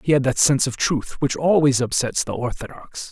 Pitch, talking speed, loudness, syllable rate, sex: 135 Hz, 210 wpm, -20 LUFS, 5.4 syllables/s, male